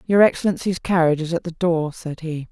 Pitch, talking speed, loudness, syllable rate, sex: 170 Hz, 215 wpm, -21 LUFS, 5.8 syllables/s, female